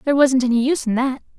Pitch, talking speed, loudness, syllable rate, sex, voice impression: 260 Hz, 260 wpm, -18 LUFS, 8.0 syllables/s, female, feminine, adult-like, tensed, bright, clear, friendly, unique, lively, intense, slightly sharp, light